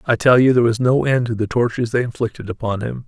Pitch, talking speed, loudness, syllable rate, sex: 120 Hz, 275 wpm, -18 LUFS, 6.8 syllables/s, male